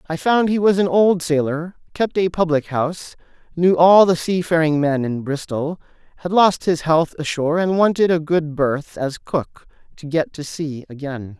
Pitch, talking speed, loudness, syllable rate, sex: 160 Hz, 185 wpm, -18 LUFS, 4.6 syllables/s, male